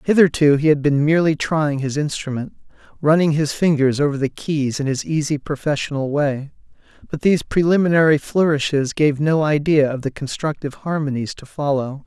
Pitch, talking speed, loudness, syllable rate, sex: 150 Hz, 160 wpm, -19 LUFS, 5.4 syllables/s, male